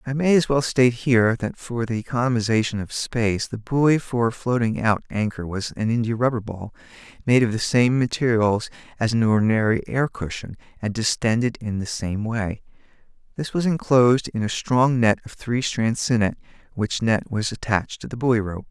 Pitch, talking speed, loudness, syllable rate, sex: 115 Hz, 185 wpm, -22 LUFS, 5.1 syllables/s, male